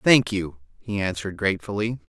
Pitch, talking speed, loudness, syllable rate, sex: 100 Hz, 140 wpm, -24 LUFS, 5.9 syllables/s, male